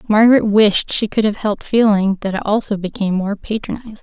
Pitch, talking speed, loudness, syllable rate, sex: 210 Hz, 195 wpm, -16 LUFS, 6.1 syllables/s, female